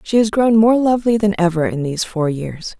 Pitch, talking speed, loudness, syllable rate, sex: 195 Hz, 235 wpm, -16 LUFS, 5.6 syllables/s, female